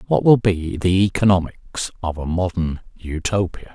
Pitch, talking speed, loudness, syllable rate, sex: 90 Hz, 145 wpm, -20 LUFS, 4.5 syllables/s, male